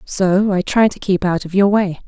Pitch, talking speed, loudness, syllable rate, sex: 190 Hz, 260 wpm, -16 LUFS, 4.7 syllables/s, female